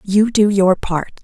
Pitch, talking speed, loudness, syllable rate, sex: 195 Hz, 195 wpm, -15 LUFS, 3.8 syllables/s, female